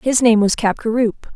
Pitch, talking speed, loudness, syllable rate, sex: 225 Hz, 180 wpm, -16 LUFS, 6.3 syllables/s, female